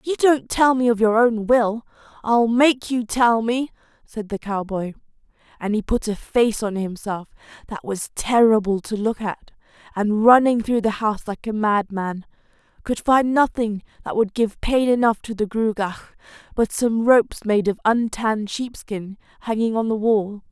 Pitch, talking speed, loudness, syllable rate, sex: 220 Hz, 175 wpm, -20 LUFS, 4.6 syllables/s, female